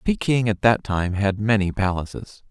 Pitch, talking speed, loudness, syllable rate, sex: 105 Hz, 170 wpm, -21 LUFS, 4.7 syllables/s, male